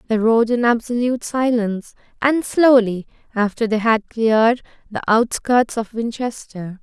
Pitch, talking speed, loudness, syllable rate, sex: 230 Hz, 130 wpm, -18 LUFS, 4.5 syllables/s, female